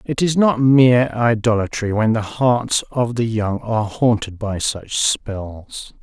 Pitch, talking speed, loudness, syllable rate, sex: 115 Hz, 160 wpm, -18 LUFS, 3.8 syllables/s, male